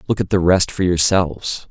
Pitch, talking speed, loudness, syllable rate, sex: 90 Hz, 210 wpm, -17 LUFS, 5.2 syllables/s, male